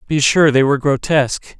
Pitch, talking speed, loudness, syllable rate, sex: 140 Hz, 190 wpm, -15 LUFS, 5.6 syllables/s, male